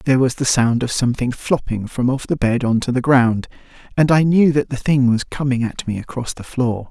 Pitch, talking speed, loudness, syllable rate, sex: 125 Hz, 245 wpm, -18 LUFS, 5.4 syllables/s, male